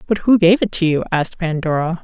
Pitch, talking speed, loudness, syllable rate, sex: 175 Hz, 235 wpm, -16 LUFS, 6.1 syllables/s, female